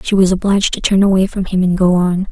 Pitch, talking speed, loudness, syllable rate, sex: 185 Hz, 285 wpm, -14 LUFS, 6.3 syllables/s, female